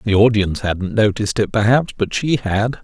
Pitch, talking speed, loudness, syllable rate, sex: 110 Hz, 190 wpm, -17 LUFS, 5.3 syllables/s, male